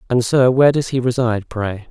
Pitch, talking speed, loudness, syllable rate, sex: 120 Hz, 220 wpm, -16 LUFS, 6.0 syllables/s, male